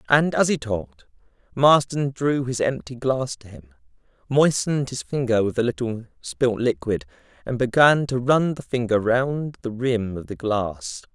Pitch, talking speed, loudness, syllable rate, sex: 125 Hz, 165 wpm, -22 LUFS, 4.4 syllables/s, male